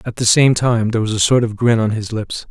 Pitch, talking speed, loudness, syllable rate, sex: 110 Hz, 310 wpm, -16 LUFS, 5.8 syllables/s, male